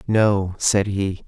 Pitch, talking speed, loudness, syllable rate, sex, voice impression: 100 Hz, 140 wpm, -20 LUFS, 2.8 syllables/s, male, very masculine, slightly young, very adult-like, very thick, tensed, powerful, bright, slightly hard, slightly muffled, fluent, cool, intellectual, very refreshing, sincere, calm, slightly mature, slightly friendly, reassuring, slightly wild, slightly sweet, lively, slightly kind